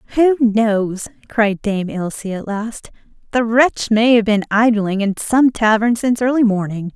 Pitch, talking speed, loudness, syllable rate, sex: 220 Hz, 165 wpm, -16 LUFS, 4.2 syllables/s, female